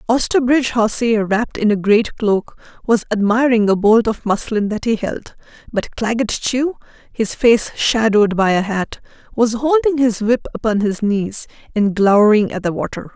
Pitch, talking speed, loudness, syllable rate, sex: 220 Hz, 170 wpm, -16 LUFS, 4.7 syllables/s, female